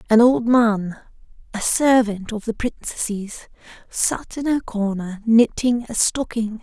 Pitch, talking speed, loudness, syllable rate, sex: 225 Hz, 135 wpm, -20 LUFS, 4.0 syllables/s, female